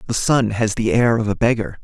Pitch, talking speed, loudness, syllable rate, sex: 110 Hz, 260 wpm, -18 LUFS, 5.5 syllables/s, male